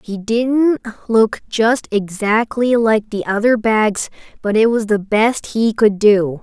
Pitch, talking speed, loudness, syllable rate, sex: 220 Hz, 160 wpm, -16 LUFS, 3.6 syllables/s, female